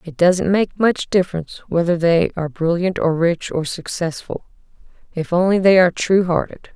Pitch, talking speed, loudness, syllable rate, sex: 175 Hz, 170 wpm, -18 LUFS, 5.1 syllables/s, female